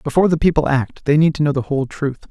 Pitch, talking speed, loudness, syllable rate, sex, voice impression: 145 Hz, 285 wpm, -17 LUFS, 6.6 syllables/s, male, masculine, adult-like, relaxed, weak, soft, slightly muffled, fluent, intellectual, sincere, calm, friendly, reassuring, unique, kind, modest